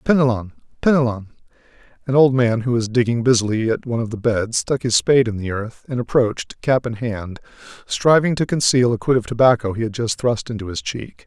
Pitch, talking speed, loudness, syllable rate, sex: 120 Hz, 210 wpm, -19 LUFS, 5.7 syllables/s, male